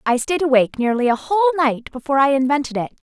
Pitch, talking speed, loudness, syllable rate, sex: 275 Hz, 205 wpm, -18 LUFS, 7.0 syllables/s, female